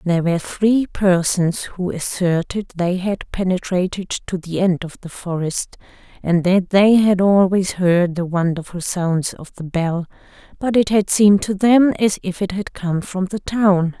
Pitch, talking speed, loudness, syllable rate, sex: 185 Hz, 175 wpm, -18 LUFS, 4.2 syllables/s, female